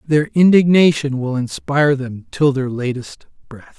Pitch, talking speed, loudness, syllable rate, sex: 140 Hz, 145 wpm, -16 LUFS, 4.4 syllables/s, male